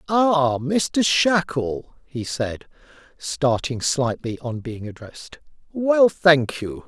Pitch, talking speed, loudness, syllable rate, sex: 145 Hz, 115 wpm, -21 LUFS, 3.3 syllables/s, male